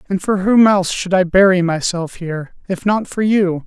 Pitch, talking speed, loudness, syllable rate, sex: 185 Hz, 215 wpm, -16 LUFS, 5.0 syllables/s, male